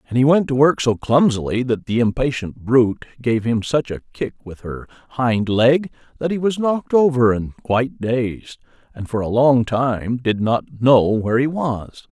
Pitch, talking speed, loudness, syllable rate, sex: 125 Hz, 190 wpm, -18 LUFS, 4.6 syllables/s, male